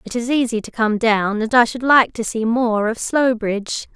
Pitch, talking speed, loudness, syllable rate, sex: 230 Hz, 225 wpm, -18 LUFS, 4.8 syllables/s, female